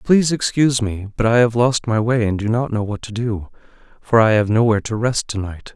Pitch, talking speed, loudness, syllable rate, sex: 115 Hz, 250 wpm, -18 LUFS, 5.7 syllables/s, male